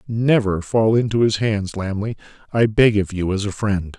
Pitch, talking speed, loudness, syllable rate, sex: 105 Hz, 195 wpm, -19 LUFS, 4.6 syllables/s, male